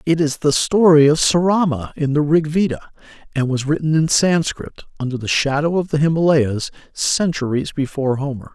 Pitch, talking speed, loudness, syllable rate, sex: 150 Hz, 170 wpm, -17 LUFS, 5.2 syllables/s, male